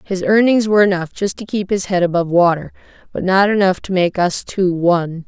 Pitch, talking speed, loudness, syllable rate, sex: 185 Hz, 215 wpm, -16 LUFS, 5.7 syllables/s, female